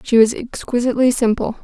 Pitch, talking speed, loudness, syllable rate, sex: 240 Hz, 145 wpm, -17 LUFS, 5.9 syllables/s, female